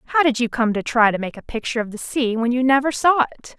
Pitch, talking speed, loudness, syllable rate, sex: 245 Hz, 300 wpm, -20 LUFS, 5.9 syllables/s, female